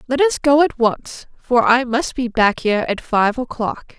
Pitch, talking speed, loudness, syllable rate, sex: 250 Hz, 210 wpm, -17 LUFS, 4.3 syllables/s, female